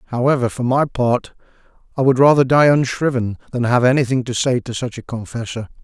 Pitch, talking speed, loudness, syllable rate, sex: 125 Hz, 185 wpm, -17 LUFS, 5.7 syllables/s, male